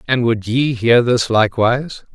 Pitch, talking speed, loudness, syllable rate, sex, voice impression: 120 Hz, 170 wpm, -15 LUFS, 4.7 syllables/s, male, masculine, very adult-like, slightly cool, sincere, slightly calm, slightly kind